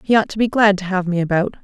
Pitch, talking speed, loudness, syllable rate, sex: 195 Hz, 330 wpm, -17 LUFS, 6.8 syllables/s, female